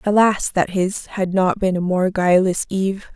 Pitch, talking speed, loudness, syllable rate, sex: 190 Hz, 190 wpm, -19 LUFS, 4.7 syllables/s, female